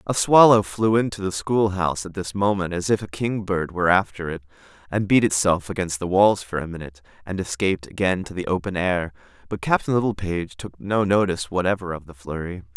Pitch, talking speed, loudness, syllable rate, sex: 90 Hz, 195 wpm, -22 LUFS, 5.9 syllables/s, male